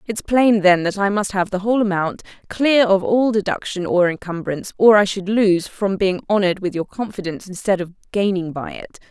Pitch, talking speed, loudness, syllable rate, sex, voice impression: 195 Hz, 205 wpm, -18 LUFS, 5.4 syllables/s, female, feminine, slightly adult-like, tensed, clear, fluent, refreshing, slightly elegant, slightly lively